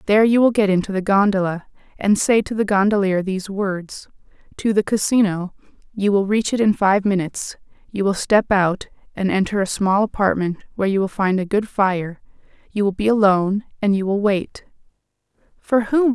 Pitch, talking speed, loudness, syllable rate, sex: 200 Hz, 185 wpm, -19 LUFS, 5.3 syllables/s, female